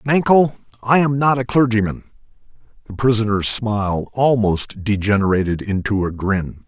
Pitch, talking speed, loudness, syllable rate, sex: 110 Hz, 125 wpm, -18 LUFS, 4.8 syllables/s, male